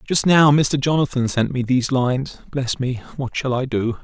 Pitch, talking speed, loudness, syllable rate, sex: 130 Hz, 195 wpm, -19 LUFS, 4.7 syllables/s, male